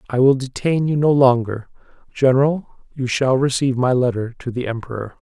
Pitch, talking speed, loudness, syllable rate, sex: 130 Hz, 170 wpm, -18 LUFS, 5.4 syllables/s, male